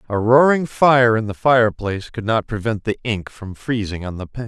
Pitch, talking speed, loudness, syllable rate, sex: 115 Hz, 215 wpm, -18 LUFS, 5.2 syllables/s, male